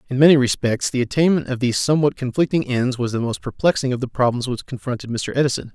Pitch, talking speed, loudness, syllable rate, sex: 130 Hz, 220 wpm, -20 LUFS, 6.7 syllables/s, male